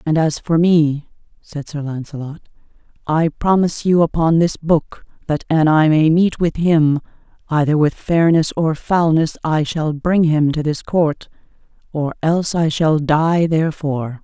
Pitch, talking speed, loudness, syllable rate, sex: 155 Hz, 160 wpm, -17 LUFS, 4.3 syllables/s, female